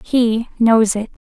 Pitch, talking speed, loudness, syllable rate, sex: 225 Hz, 145 wpm, -16 LUFS, 3.1 syllables/s, female